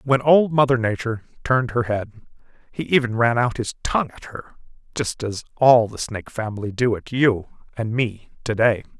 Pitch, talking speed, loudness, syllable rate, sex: 120 Hz, 185 wpm, -21 LUFS, 5.2 syllables/s, male